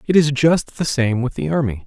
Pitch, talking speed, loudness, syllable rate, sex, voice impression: 135 Hz, 255 wpm, -18 LUFS, 5.3 syllables/s, male, masculine, adult-like, tensed, slightly powerful, slightly hard, raspy, intellectual, calm, friendly, reassuring, wild, lively, slightly kind